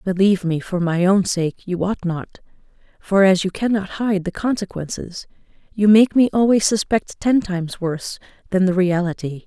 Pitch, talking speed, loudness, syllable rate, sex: 190 Hz, 170 wpm, -19 LUFS, 5.0 syllables/s, female